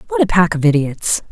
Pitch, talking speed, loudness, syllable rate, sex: 145 Hz, 230 wpm, -15 LUFS, 5.6 syllables/s, female